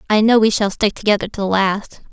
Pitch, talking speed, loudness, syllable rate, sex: 205 Hz, 255 wpm, -16 LUFS, 6.0 syllables/s, female